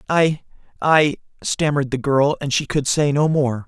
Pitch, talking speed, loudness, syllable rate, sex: 145 Hz, 165 wpm, -19 LUFS, 4.6 syllables/s, male